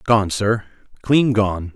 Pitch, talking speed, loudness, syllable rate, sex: 110 Hz, 105 wpm, -18 LUFS, 3.2 syllables/s, male